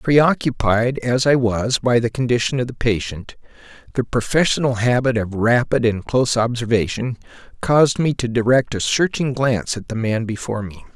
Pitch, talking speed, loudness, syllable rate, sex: 120 Hz, 165 wpm, -19 LUFS, 5.1 syllables/s, male